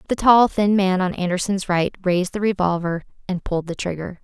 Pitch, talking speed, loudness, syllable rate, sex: 190 Hz, 200 wpm, -20 LUFS, 5.7 syllables/s, female